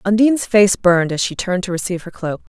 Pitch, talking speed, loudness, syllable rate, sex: 190 Hz, 235 wpm, -17 LUFS, 6.8 syllables/s, female